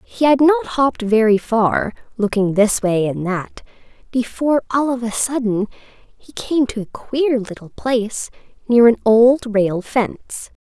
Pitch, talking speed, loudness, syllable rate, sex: 235 Hz, 160 wpm, -17 LUFS, 4.1 syllables/s, female